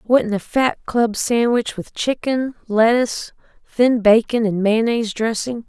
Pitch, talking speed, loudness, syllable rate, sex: 230 Hz, 135 wpm, -18 LUFS, 4.1 syllables/s, female